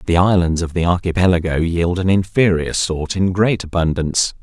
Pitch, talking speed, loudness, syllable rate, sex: 90 Hz, 165 wpm, -17 LUFS, 5.2 syllables/s, male